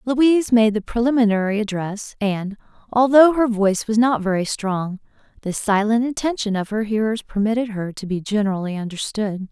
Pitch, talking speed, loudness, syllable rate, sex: 215 Hz, 160 wpm, -20 LUFS, 5.3 syllables/s, female